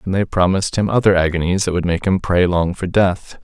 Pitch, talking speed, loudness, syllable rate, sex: 90 Hz, 245 wpm, -17 LUFS, 5.7 syllables/s, male